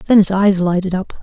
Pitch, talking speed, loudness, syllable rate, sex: 190 Hz, 245 wpm, -15 LUFS, 5.1 syllables/s, female